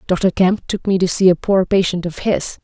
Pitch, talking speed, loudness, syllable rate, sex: 185 Hz, 250 wpm, -16 LUFS, 4.9 syllables/s, female